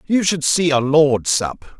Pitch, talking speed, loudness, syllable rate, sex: 150 Hz, 200 wpm, -16 LUFS, 3.7 syllables/s, male